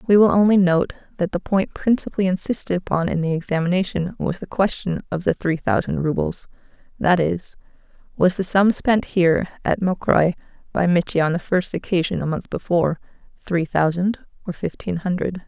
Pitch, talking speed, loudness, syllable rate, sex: 180 Hz, 170 wpm, -21 LUFS, 5.3 syllables/s, female